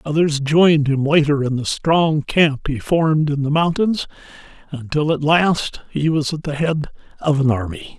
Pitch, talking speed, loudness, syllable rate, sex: 150 Hz, 180 wpm, -18 LUFS, 4.6 syllables/s, male